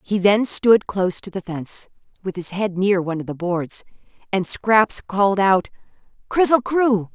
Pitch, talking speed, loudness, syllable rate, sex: 200 Hz, 175 wpm, -20 LUFS, 4.6 syllables/s, female